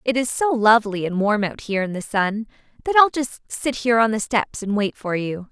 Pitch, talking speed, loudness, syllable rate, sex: 225 Hz, 250 wpm, -20 LUFS, 5.5 syllables/s, female